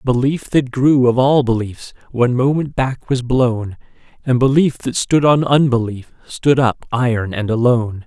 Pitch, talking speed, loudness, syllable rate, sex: 125 Hz, 165 wpm, -16 LUFS, 4.5 syllables/s, male